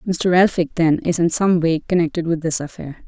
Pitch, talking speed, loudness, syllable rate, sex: 170 Hz, 215 wpm, -18 LUFS, 5.4 syllables/s, female